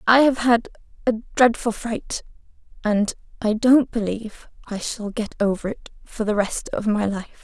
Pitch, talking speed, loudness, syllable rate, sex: 225 Hz, 170 wpm, -22 LUFS, 4.5 syllables/s, female